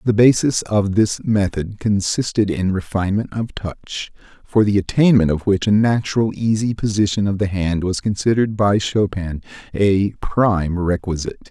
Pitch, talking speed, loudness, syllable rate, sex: 100 Hz, 150 wpm, -18 LUFS, 4.8 syllables/s, male